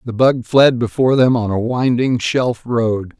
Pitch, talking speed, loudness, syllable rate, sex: 120 Hz, 190 wpm, -15 LUFS, 4.3 syllables/s, male